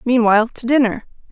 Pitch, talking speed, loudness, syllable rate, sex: 235 Hz, 135 wpm, -16 LUFS, 6.0 syllables/s, female